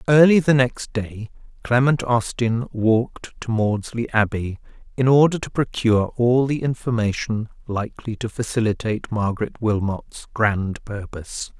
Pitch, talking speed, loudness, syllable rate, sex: 115 Hz, 125 wpm, -21 LUFS, 4.7 syllables/s, male